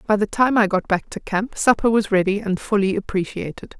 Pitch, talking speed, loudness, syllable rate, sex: 205 Hz, 220 wpm, -20 LUFS, 5.5 syllables/s, female